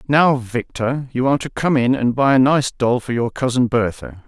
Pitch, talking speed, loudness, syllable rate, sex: 130 Hz, 225 wpm, -18 LUFS, 5.0 syllables/s, male